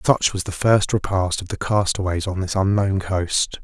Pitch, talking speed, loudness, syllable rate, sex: 95 Hz, 200 wpm, -21 LUFS, 4.6 syllables/s, male